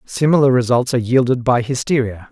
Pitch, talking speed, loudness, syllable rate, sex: 125 Hz, 155 wpm, -16 LUFS, 5.9 syllables/s, male